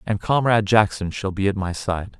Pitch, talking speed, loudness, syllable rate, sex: 100 Hz, 220 wpm, -21 LUFS, 5.3 syllables/s, male